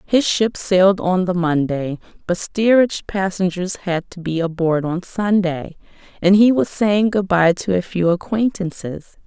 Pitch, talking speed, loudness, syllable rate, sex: 185 Hz, 160 wpm, -18 LUFS, 4.4 syllables/s, female